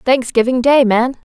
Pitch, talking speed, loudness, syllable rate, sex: 250 Hz, 135 wpm, -13 LUFS, 4.4 syllables/s, female